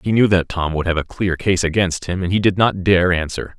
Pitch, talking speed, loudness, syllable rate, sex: 90 Hz, 285 wpm, -18 LUFS, 5.4 syllables/s, male